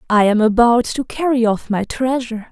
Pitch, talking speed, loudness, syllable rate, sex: 235 Hz, 190 wpm, -16 LUFS, 5.2 syllables/s, female